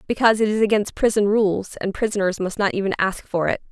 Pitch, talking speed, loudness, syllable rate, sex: 205 Hz, 225 wpm, -21 LUFS, 6.0 syllables/s, female